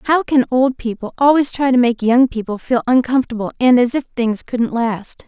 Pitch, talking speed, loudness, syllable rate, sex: 245 Hz, 205 wpm, -16 LUFS, 5.1 syllables/s, female